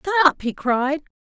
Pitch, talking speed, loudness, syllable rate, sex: 300 Hz, 145 wpm, -20 LUFS, 4.9 syllables/s, female